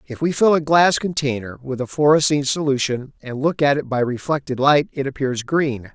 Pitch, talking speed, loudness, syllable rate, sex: 140 Hz, 200 wpm, -19 LUFS, 5.1 syllables/s, male